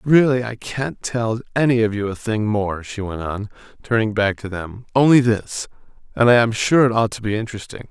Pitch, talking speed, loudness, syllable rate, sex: 110 Hz, 210 wpm, -19 LUFS, 5.2 syllables/s, male